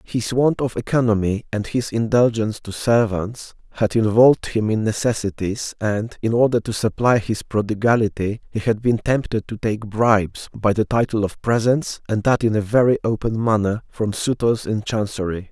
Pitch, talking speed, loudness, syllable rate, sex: 110 Hz, 170 wpm, -20 LUFS, 5.0 syllables/s, male